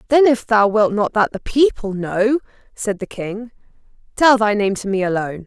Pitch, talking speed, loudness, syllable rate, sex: 215 Hz, 200 wpm, -17 LUFS, 4.9 syllables/s, female